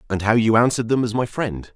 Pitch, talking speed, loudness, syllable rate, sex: 115 Hz, 275 wpm, -20 LUFS, 6.5 syllables/s, male